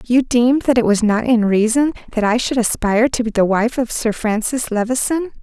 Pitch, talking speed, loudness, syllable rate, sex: 235 Hz, 220 wpm, -17 LUFS, 5.2 syllables/s, female